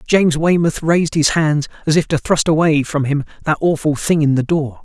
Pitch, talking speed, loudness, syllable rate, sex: 155 Hz, 225 wpm, -16 LUFS, 5.4 syllables/s, male